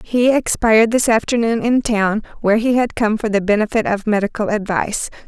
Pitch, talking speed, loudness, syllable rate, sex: 220 Hz, 180 wpm, -17 LUFS, 5.6 syllables/s, female